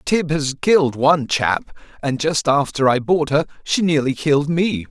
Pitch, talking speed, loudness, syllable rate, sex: 150 Hz, 185 wpm, -18 LUFS, 4.6 syllables/s, male